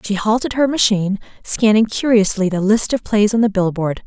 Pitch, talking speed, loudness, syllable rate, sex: 210 Hz, 190 wpm, -16 LUFS, 5.4 syllables/s, female